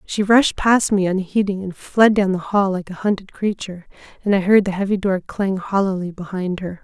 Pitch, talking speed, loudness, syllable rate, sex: 195 Hz, 210 wpm, -19 LUFS, 5.2 syllables/s, female